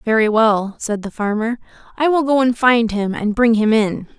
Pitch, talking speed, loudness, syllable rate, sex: 225 Hz, 215 wpm, -17 LUFS, 4.7 syllables/s, female